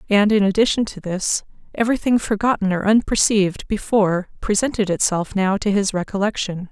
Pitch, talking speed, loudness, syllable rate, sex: 205 Hz, 145 wpm, -19 LUFS, 5.6 syllables/s, female